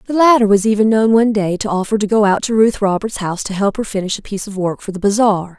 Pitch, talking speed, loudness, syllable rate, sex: 210 Hz, 290 wpm, -15 LUFS, 6.6 syllables/s, female